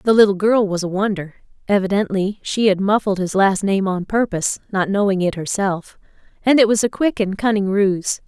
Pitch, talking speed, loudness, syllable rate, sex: 200 Hz, 180 wpm, -18 LUFS, 5.2 syllables/s, female